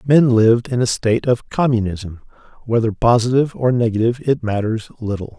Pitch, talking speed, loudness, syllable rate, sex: 115 Hz, 155 wpm, -17 LUFS, 5.7 syllables/s, male